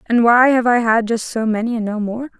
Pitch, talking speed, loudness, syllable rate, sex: 230 Hz, 275 wpm, -16 LUFS, 5.4 syllables/s, female